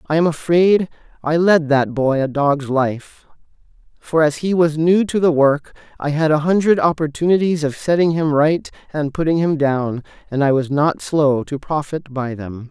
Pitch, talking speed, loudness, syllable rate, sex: 150 Hz, 190 wpm, -17 LUFS, 4.5 syllables/s, male